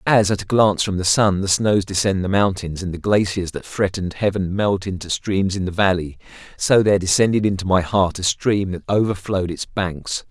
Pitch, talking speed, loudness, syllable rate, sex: 95 Hz, 210 wpm, -19 LUFS, 5.3 syllables/s, male